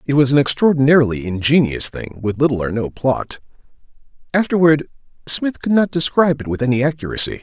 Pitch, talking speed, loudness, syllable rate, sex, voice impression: 140 Hz, 160 wpm, -17 LUFS, 6.1 syllables/s, male, very masculine, very adult-like, middle-aged, very thick, very tensed, very powerful, bright, soft, slightly muffled, fluent, raspy, very cool, very intellectual, slightly refreshing, very sincere, very calm, very mature, friendly, reassuring, slightly unique, slightly elegant, wild, sweet, lively, very kind